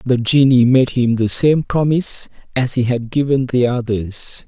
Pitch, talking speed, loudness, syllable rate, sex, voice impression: 125 Hz, 175 wpm, -16 LUFS, 4.4 syllables/s, male, masculine, slightly young, slightly adult-like, slightly thick, relaxed, weak, slightly dark, slightly hard, muffled, slightly fluent, cool, very intellectual, slightly refreshing, very sincere, very calm, mature, friendly, reassuring, slightly unique, elegant, slightly wild, slightly sweet, slightly lively, kind, modest